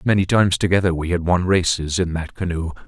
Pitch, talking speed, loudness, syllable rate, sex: 90 Hz, 210 wpm, -19 LUFS, 6.0 syllables/s, male